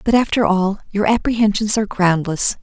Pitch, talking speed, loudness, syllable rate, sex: 205 Hz, 160 wpm, -17 LUFS, 5.4 syllables/s, female